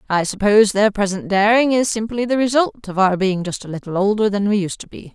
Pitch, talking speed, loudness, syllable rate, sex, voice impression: 205 Hz, 245 wpm, -18 LUFS, 5.9 syllables/s, female, very feminine, slightly young, very adult-like, thin, tensed, slightly weak, slightly dark, very hard, very clear, very fluent, cute, slightly cool, very intellectual, refreshing, sincere, very calm, friendly, reassuring, unique, very elegant, slightly wild, sweet, slightly lively, strict, slightly intense